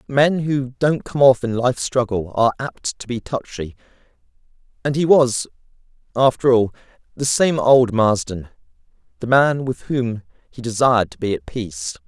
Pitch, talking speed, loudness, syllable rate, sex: 120 Hz, 160 wpm, -19 LUFS, 4.8 syllables/s, male